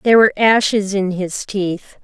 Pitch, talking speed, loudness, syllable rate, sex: 200 Hz, 175 wpm, -16 LUFS, 4.9 syllables/s, female